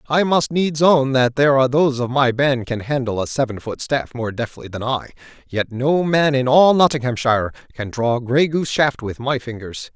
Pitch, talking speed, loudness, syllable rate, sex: 130 Hz, 210 wpm, -18 LUFS, 5.1 syllables/s, male